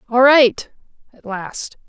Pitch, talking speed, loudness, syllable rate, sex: 240 Hz, 130 wpm, -15 LUFS, 3.3 syllables/s, female